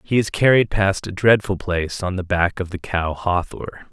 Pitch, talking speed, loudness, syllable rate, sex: 95 Hz, 215 wpm, -20 LUFS, 5.2 syllables/s, male